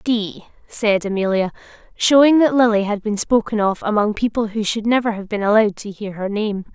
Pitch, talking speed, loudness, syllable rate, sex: 215 Hz, 195 wpm, -18 LUFS, 5.2 syllables/s, female